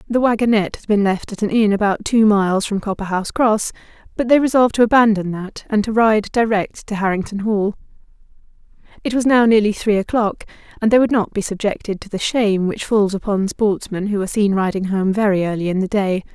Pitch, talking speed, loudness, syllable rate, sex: 210 Hz, 205 wpm, -18 LUFS, 6.0 syllables/s, female